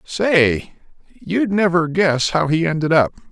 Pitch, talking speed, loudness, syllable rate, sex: 165 Hz, 145 wpm, -17 LUFS, 3.7 syllables/s, male